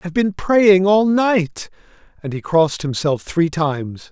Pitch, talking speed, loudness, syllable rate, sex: 175 Hz, 160 wpm, -17 LUFS, 4.3 syllables/s, male